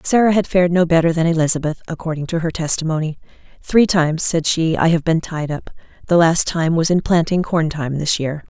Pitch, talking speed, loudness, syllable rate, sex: 165 Hz, 210 wpm, -17 LUFS, 5.8 syllables/s, female